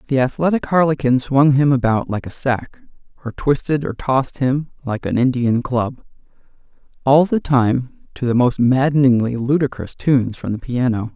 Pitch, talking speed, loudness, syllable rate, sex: 130 Hz, 160 wpm, -18 LUFS, 4.9 syllables/s, male